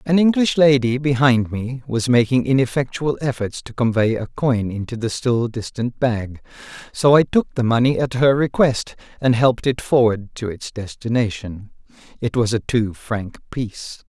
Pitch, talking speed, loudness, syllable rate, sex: 125 Hz, 165 wpm, -19 LUFS, 4.6 syllables/s, male